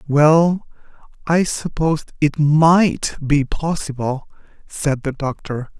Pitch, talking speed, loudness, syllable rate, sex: 150 Hz, 105 wpm, -18 LUFS, 3.4 syllables/s, male